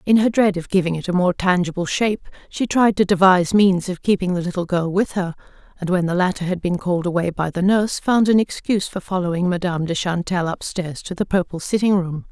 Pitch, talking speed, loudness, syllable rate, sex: 185 Hz, 230 wpm, -19 LUFS, 6.1 syllables/s, female